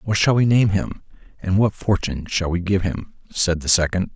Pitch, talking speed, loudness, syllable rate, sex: 95 Hz, 215 wpm, -20 LUFS, 5.1 syllables/s, male